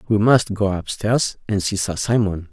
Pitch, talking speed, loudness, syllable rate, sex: 100 Hz, 190 wpm, -20 LUFS, 4.5 syllables/s, male